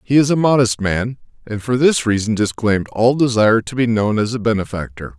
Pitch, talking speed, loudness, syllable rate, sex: 115 Hz, 210 wpm, -17 LUFS, 5.7 syllables/s, male